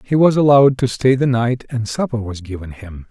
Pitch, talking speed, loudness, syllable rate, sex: 120 Hz, 230 wpm, -16 LUFS, 5.5 syllables/s, male